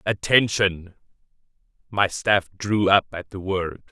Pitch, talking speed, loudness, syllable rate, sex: 95 Hz, 125 wpm, -21 LUFS, 3.6 syllables/s, male